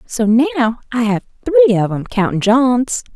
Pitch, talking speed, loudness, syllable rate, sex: 230 Hz, 170 wpm, -15 LUFS, 4.2 syllables/s, female